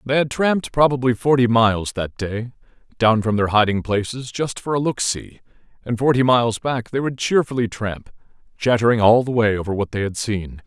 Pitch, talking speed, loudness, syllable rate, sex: 120 Hz, 195 wpm, -19 LUFS, 5.3 syllables/s, male